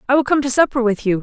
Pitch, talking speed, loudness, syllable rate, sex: 250 Hz, 340 wpm, -16 LUFS, 7.6 syllables/s, female